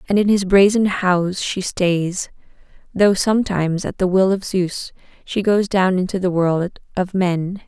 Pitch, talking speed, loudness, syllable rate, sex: 185 Hz, 170 wpm, -18 LUFS, 4.4 syllables/s, female